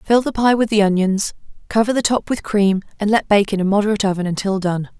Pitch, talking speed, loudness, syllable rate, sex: 205 Hz, 240 wpm, -18 LUFS, 6.2 syllables/s, female